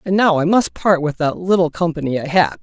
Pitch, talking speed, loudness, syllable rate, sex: 170 Hz, 250 wpm, -17 LUFS, 5.6 syllables/s, male